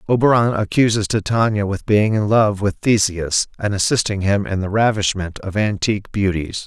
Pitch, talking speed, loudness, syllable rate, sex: 100 Hz, 160 wpm, -18 LUFS, 5.0 syllables/s, male